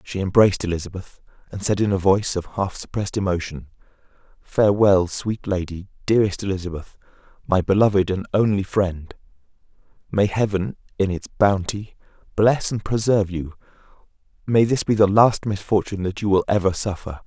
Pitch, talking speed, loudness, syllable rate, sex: 100 Hz, 145 wpm, -21 LUFS, 5.6 syllables/s, male